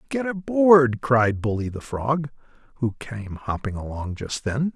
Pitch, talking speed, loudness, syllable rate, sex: 130 Hz, 165 wpm, -23 LUFS, 4.0 syllables/s, male